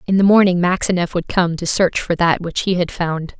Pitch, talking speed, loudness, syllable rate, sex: 175 Hz, 245 wpm, -17 LUFS, 5.2 syllables/s, female